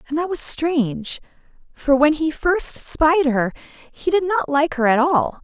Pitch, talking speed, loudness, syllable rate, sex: 295 Hz, 190 wpm, -19 LUFS, 4.1 syllables/s, female